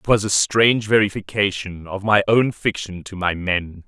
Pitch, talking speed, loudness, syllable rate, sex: 100 Hz, 170 wpm, -19 LUFS, 4.6 syllables/s, male